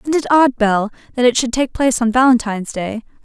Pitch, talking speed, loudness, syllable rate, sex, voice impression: 240 Hz, 220 wpm, -16 LUFS, 6.0 syllables/s, female, feminine, adult-like, tensed, slightly hard, fluent, intellectual, calm, slightly friendly, elegant, sharp